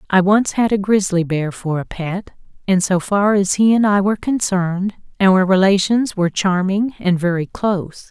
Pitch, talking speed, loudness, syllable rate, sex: 190 Hz, 185 wpm, -17 LUFS, 4.8 syllables/s, female